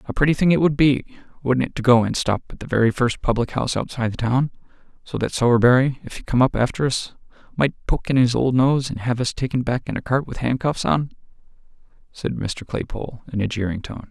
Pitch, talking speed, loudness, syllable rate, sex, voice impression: 125 Hz, 230 wpm, -21 LUFS, 5.9 syllables/s, male, masculine, adult-like, muffled, cool, sincere, very calm, sweet